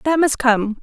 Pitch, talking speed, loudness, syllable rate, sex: 260 Hz, 215 wpm, -17 LUFS, 4.4 syllables/s, female